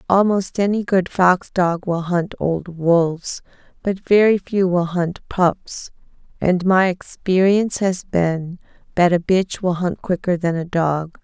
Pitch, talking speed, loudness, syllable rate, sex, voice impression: 180 Hz, 155 wpm, -19 LUFS, 3.8 syllables/s, female, feminine, adult-like, slightly dark, slightly calm, slightly elegant, slightly kind